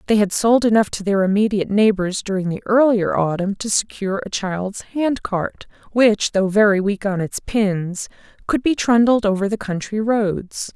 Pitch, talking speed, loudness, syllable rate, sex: 205 Hz, 175 wpm, -19 LUFS, 4.7 syllables/s, female